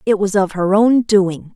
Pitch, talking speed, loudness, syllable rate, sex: 200 Hz, 230 wpm, -15 LUFS, 4.2 syllables/s, female